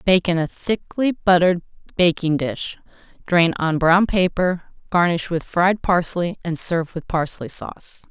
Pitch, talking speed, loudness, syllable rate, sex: 175 Hz, 150 wpm, -20 LUFS, 4.4 syllables/s, female